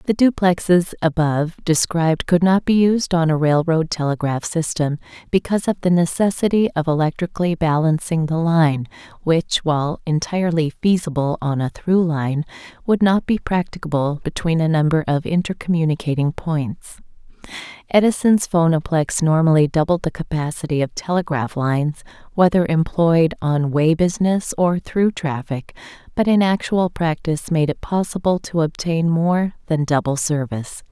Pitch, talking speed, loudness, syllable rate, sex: 165 Hz, 135 wpm, -19 LUFS, 4.9 syllables/s, female